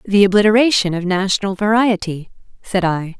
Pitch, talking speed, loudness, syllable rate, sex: 195 Hz, 130 wpm, -16 LUFS, 5.4 syllables/s, female